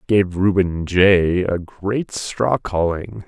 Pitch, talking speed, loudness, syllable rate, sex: 95 Hz, 110 wpm, -19 LUFS, 2.9 syllables/s, male